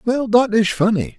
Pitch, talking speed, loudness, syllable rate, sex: 215 Hz, 205 wpm, -17 LUFS, 4.8 syllables/s, male